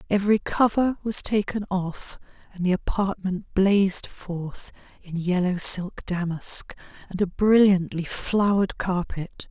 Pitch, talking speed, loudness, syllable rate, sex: 190 Hz, 120 wpm, -23 LUFS, 4.0 syllables/s, female